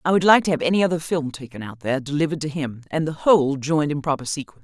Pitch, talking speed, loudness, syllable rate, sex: 150 Hz, 270 wpm, -21 LUFS, 7.4 syllables/s, female